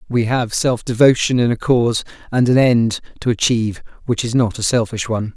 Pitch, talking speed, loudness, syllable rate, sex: 120 Hz, 200 wpm, -17 LUFS, 5.6 syllables/s, male